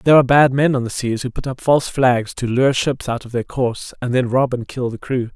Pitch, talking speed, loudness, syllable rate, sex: 125 Hz, 290 wpm, -18 LUFS, 5.8 syllables/s, male